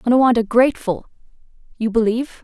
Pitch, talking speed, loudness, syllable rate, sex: 235 Hz, 100 wpm, -18 LUFS, 6.7 syllables/s, female